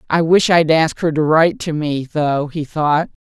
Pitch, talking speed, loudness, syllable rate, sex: 155 Hz, 220 wpm, -16 LUFS, 4.8 syllables/s, female